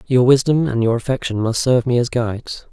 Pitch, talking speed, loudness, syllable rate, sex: 125 Hz, 220 wpm, -17 LUFS, 5.9 syllables/s, male